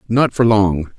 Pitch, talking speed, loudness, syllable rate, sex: 105 Hz, 185 wpm, -15 LUFS, 3.8 syllables/s, male